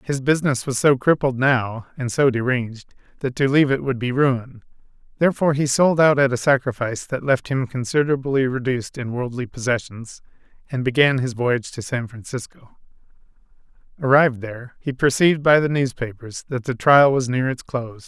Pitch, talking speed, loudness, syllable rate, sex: 130 Hz, 175 wpm, -20 LUFS, 5.6 syllables/s, male